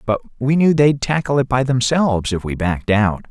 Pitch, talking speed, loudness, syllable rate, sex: 125 Hz, 220 wpm, -17 LUFS, 5.4 syllables/s, male